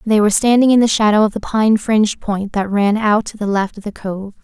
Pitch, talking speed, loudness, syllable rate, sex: 210 Hz, 270 wpm, -15 LUFS, 5.6 syllables/s, female